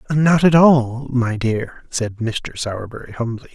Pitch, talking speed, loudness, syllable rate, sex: 125 Hz, 150 wpm, -18 LUFS, 4.0 syllables/s, male